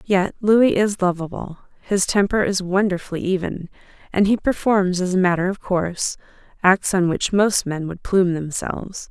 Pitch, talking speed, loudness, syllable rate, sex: 190 Hz, 165 wpm, -20 LUFS, 4.8 syllables/s, female